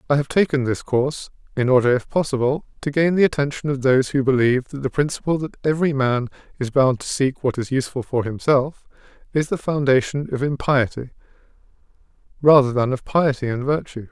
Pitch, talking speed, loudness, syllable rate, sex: 135 Hz, 185 wpm, -20 LUFS, 5.9 syllables/s, male